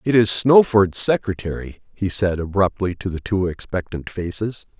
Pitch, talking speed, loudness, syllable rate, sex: 100 Hz, 150 wpm, -20 LUFS, 4.7 syllables/s, male